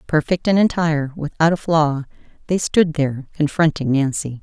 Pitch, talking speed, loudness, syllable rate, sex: 155 Hz, 150 wpm, -19 LUFS, 5.0 syllables/s, female